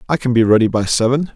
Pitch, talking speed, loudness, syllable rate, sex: 120 Hz, 265 wpm, -15 LUFS, 6.8 syllables/s, male